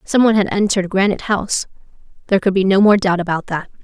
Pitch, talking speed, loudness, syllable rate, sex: 195 Hz, 205 wpm, -16 LUFS, 7.3 syllables/s, female